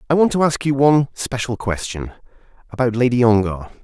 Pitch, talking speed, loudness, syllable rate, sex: 125 Hz, 155 wpm, -18 LUFS, 5.8 syllables/s, male